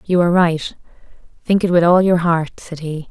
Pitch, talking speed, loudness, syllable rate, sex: 170 Hz, 195 wpm, -16 LUFS, 5.2 syllables/s, female